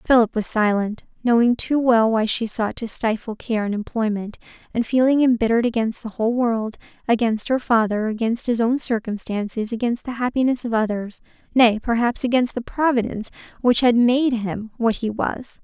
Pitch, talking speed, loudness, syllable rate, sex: 230 Hz, 175 wpm, -21 LUFS, 5.2 syllables/s, female